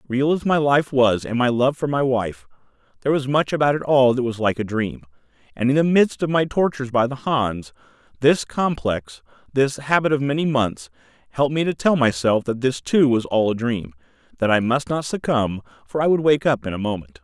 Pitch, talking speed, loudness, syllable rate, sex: 130 Hz, 215 wpm, -20 LUFS, 5.3 syllables/s, male